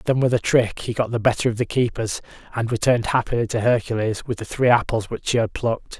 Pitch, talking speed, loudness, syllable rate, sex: 115 Hz, 240 wpm, -21 LUFS, 6.2 syllables/s, male